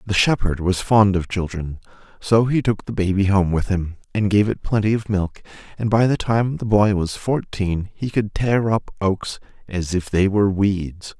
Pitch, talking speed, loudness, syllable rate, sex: 100 Hz, 205 wpm, -20 LUFS, 4.5 syllables/s, male